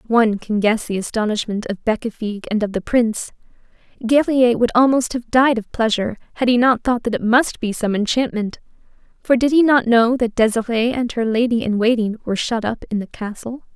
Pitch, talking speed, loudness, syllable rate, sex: 230 Hz, 200 wpm, -18 LUFS, 5.6 syllables/s, female